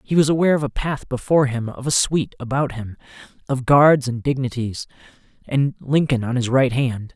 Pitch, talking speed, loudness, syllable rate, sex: 130 Hz, 195 wpm, -20 LUFS, 5.5 syllables/s, male